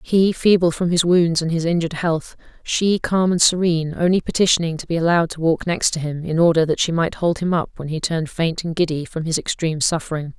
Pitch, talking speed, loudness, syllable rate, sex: 165 Hz, 235 wpm, -19 LUFS, 5.9 syllables/s, female